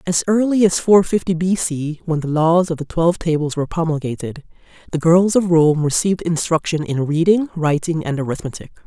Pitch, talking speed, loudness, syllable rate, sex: 165 Hz, 185 wpm, -18 LUFS, 5.5 syllables/s, female